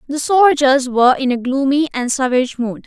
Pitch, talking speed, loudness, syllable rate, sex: 265 Hz, 190 wpm, -15 LUFS, 5.5 syllables/s, female